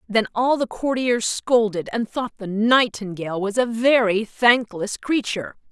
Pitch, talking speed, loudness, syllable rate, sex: 225 Hz, 145 wpm, -21 LUFS, 4.3 syllables/s, female